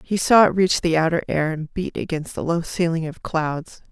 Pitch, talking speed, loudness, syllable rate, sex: 170 Hz, 230 wpm, -21 LUFS, 4.9 syllables/s, female